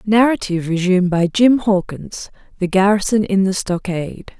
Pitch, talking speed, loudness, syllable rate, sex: 195 Hz, 135 wpm, -16 LUFS, 5.1 syllables/s, female